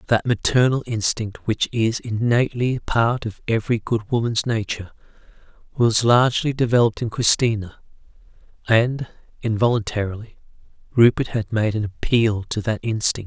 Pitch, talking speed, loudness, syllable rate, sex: 115 Hz, 120 wpm, -21 LUFS, 5.0 syllables/s, male